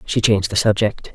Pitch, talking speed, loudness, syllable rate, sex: 105 Hz, 210 wpm, -18 LUFS, 5.7 syllables/s, female